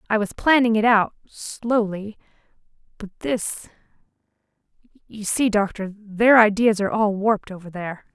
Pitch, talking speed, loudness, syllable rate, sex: 210 Hz, 125 wpm, -20 LUFS, 4.7 syllables/s, female